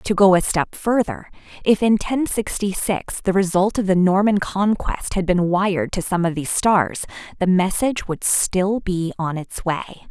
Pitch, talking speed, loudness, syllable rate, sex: 190 Hz, 190 wpm, -20 LUFS, 4.6 syllables/s, female